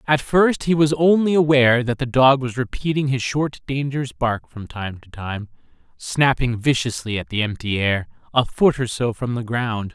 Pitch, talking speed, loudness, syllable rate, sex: 125 Hz, 195 wpm, -20 LUFS, 4.8 syllables/s, male